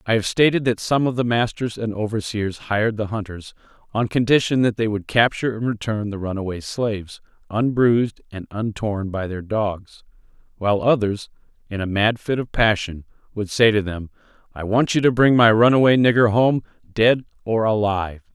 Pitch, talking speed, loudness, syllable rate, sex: 110 Hz, 175 wpm, -20 LUFS, 5.2 syllables/s, male